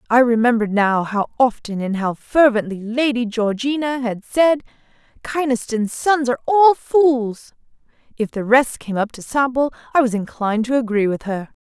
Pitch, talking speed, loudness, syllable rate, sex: 240 Hz, 160 wpm, -18 LUFS, 4.8 syllables/s, female